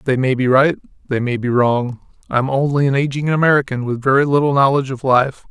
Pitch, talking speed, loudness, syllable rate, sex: 135 Hz, 220 wpm, -16 LUFS, 6.2 syllables/s, male